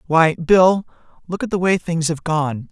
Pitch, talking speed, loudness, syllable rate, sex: 170 Hz, 200 wpm, -18 LUFS, 4.3 syllables/s, male